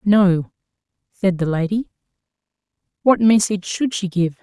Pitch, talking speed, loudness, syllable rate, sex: 195 Hz, 120 wpm, -19 LUFS, 4.7 syllables/s, female